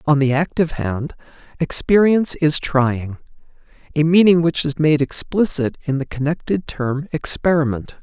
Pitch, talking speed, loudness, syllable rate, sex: 150 Hz, 125 wpm, -18 LUFS, 4.7 syllables/s, male